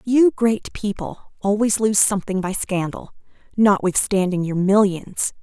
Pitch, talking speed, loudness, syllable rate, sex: 200 Hz, 120 wpm, -20 LUFS, 4.3 syllables/s, female